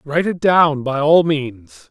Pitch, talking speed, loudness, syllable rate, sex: 145 Hz, 190 wpm, -16 LUFS, 3.9 syllables/s, male